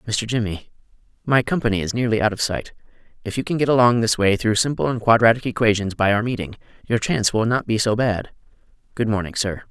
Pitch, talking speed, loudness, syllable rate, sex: 110 Hz, 200 wpm, -20 LUFS, 6.2 syllables/s, male